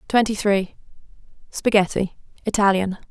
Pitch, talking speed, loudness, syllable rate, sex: 200 Hz, 60 wpm, -21 LUFS, 5.1 syllables/s, female